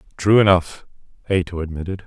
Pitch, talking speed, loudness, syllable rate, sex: 90 Hz, 115 wpm, -19 LUFS, 6.2 syllables/s, male